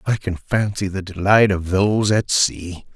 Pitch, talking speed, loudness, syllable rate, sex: 95 Hz, 185 wpm, -19 LUFS, 4.4 syllables/s, male